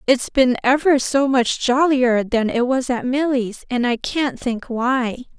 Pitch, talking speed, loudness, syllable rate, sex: 255 Hz, 180 wpm, -19 LUFS, 3.9 syllables/s, female